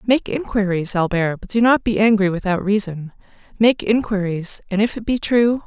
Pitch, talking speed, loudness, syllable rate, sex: 205 Hz, 180 wpm, -18 LUFS, 5.0 syllables/s, female